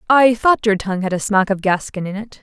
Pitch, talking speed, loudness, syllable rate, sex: 205 Hz, 270 wpm, -17 LUFS, 5.8 syllables/s, female